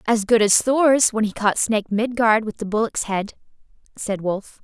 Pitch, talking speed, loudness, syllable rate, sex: 215 Hz, 195 wpm, -19 LUFS, 4.6 syllables/s, female